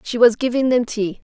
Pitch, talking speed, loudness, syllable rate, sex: 235 Hz, 230 wpm, -18 LUFS, 5.3 syllables/s, female